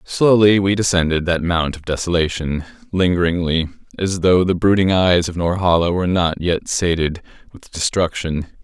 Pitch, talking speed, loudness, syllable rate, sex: 85 Hz, 145 wpm, -17 LUFS, 4.9 syllables/s, male